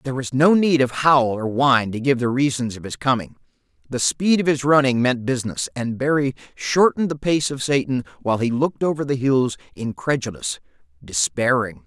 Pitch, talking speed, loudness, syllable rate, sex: 130 Hz, 185 wpm, -20 LUFS, 5.5 syllables/s, male